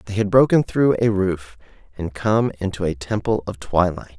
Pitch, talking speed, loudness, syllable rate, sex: 100 Hz, 185 wpm, -20 LUFS, 5.0 syllables/s, male